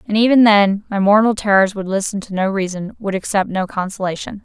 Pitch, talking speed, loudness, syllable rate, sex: 200 Hz, 190 wpm, -16 LUFS, 5.7 syllables/s, female